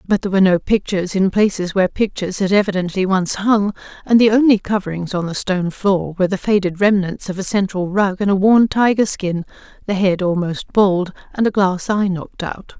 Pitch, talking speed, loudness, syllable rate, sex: 195 Hz, 205 wpm, -17 LUFS, 5.7 syllables/s, female